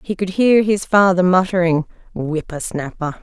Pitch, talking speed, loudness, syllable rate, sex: 180 Hz, 150 wpm, -17 LUFS, 4.6 syllables/s, female